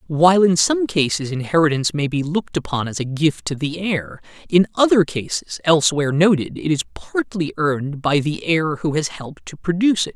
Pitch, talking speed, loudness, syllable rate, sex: 160 Hz, 195 wpm, -19 LUFS, 5.5 syllables/s, male